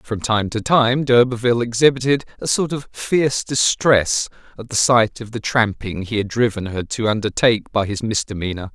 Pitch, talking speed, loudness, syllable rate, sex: 115 Hz, 180 wpm, -18 LUFS, 5.1 syllables/s, male